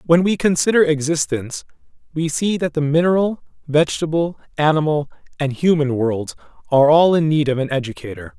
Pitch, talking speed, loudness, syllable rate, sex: 155 Hz, 150 wpm, -18 LUFS, 5.7 syllables/s, male